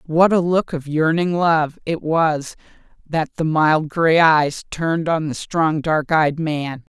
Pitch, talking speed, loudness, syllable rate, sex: 160 Hz, 175 wpm, -18 LUFS, 3.6 syllables/s, female